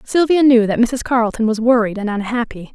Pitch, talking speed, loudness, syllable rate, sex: 235 Hz, 195 wpm, -16 LUFS, 5.8 syllables/s, female